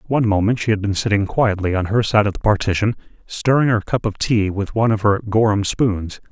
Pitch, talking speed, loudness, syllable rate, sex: 105 Hz, 230 wpm, -18 LUFS, 5.7 syllables/s, male